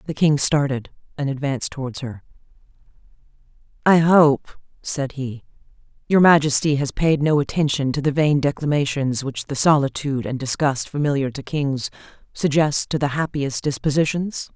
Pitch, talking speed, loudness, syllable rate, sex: 140 Hz, 140 wpm, -20 LUFS, 5.0 syllables/s, female